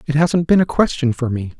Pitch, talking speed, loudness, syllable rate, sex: 145 Hz, 265 wpm, -17 LUFS, 5.6 syllables/s, male